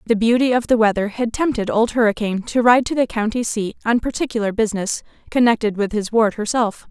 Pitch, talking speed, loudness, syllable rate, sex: 225 Hz, 200 wpm, -19 LUFS, 6.0 syllables/s, female